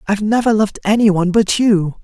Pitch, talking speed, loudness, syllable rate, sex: 205 Hz, 175 wpm, -14 LUFS, 6.0 syllables/s, male